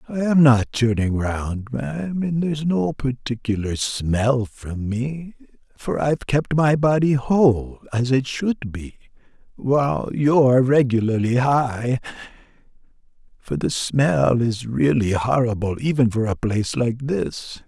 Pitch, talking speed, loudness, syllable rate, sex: 130 Hz, 130 wpm, -20 LUFS, 3.9 syllables/s, male